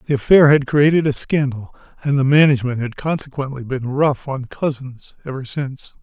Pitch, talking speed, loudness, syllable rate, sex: 135 Hz, 170 wpm, -18 LUFS, 5.4 syllables/s, male